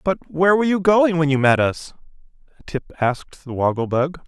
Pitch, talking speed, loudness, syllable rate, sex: 155 Hz, 195 wpm, -19 LUFS, 5.7 syllables/s, male